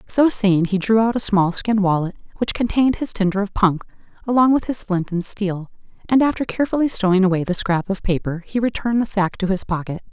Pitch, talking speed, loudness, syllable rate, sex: 205 Hz, 220 wpm, -19 LUFS, 5.9 syllables/s, female